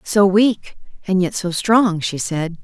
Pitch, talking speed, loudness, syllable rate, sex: 190 Hz, 180 wpm, -17 LUFS, 3.6 syllables/s, female